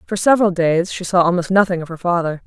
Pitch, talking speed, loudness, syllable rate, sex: 180 Hz, 245 wpm, -17 LUFS, 6.5 syllables/s, female